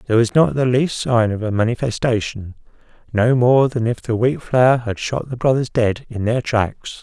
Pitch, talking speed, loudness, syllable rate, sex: 120 Hz, 195 wpm, -18 LUFS, 4.8 syllables/s, male